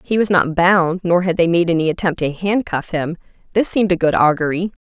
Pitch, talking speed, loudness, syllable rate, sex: 175 Hz, 225 wpm, -17 LUFS, 5.7 syllables/s, female